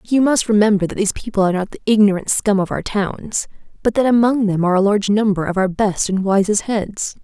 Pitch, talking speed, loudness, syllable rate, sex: 205 Hz, 230 wpm, -17 LUFS, 6.1 syllables/s, female